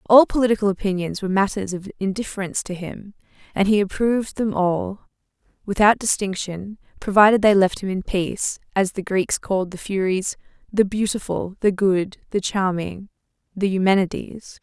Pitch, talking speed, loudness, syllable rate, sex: 195 Hz, 150 wpm, -21 LUFS, 5.2 syllables/s, female